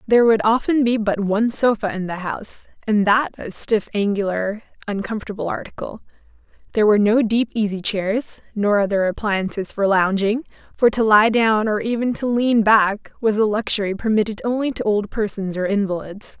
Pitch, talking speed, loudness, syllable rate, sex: 210 Hz, 170 wpm, -19 LUFS, 5.3 syllables/s, female